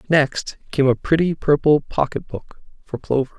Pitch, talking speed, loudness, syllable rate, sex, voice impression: 145 Hz, 160 wpm, -19 LUFS, 4.6 syllables/s, male, masculine, adult-like, tensed, slightly powerful, bright, clear, fluent, cool, intellectual, calm, friendly, reassuring, wild, lively, kind